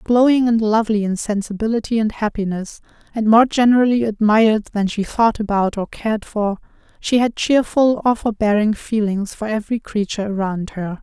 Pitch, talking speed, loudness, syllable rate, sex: 215 Hz, 160 wpm, -18 LUFS, 5.3 syllables/s, female